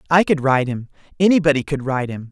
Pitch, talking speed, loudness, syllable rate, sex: 145 Hz, 205 wpm, -18 LUFS, 6.0 syllables/s, male